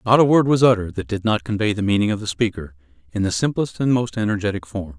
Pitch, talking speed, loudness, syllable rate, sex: 105 Hz, 255 wpm, -20 LUFS, 6.6 syllables/s, male